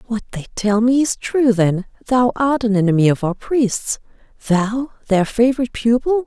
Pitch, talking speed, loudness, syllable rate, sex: 230 Hz, 170 wpm, -18 LUFS, 4.8 syllables/s, female